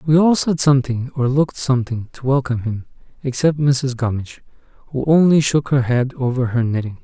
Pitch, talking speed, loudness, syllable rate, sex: 135 Hz, 180 wpm, -18 LUFS, 5.8 syllables/s, male